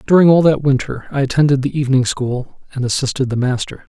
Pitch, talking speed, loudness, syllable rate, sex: 135 Hz, 195 wpm, -16 LUFS, 6.1 syllables/s, male